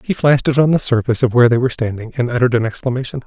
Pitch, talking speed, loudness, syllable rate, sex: 125 Hz, 275 wpm, -16 LUFS, 8.3 syllables/s, male